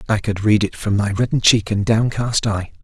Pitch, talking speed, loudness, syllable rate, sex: 105 Hz, 235 wpm, -18 LUFS, 5.4 syllables/s, male